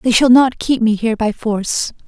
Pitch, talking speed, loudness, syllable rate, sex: 230 Hz, 230 wpm, -15 LUFS, 5.2 syllables/s, female